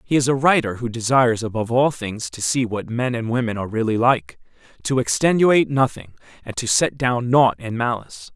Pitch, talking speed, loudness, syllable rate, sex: 120 Hz, 195 wpm, -20 LUFS, 5.6 syllables/s, male